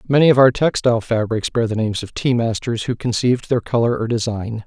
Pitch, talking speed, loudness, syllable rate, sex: 115 Hz, 220 wpm, -18 LUFS, 6.0 syllables/s, male